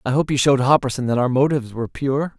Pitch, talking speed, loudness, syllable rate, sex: 135 Hz, 250 wpm, -19 LUFS, 7.0 syllables/s, male